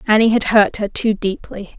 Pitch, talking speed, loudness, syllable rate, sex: 210 Hz, 200 wpm, -16 LUFS, 4.9 syllables/s, female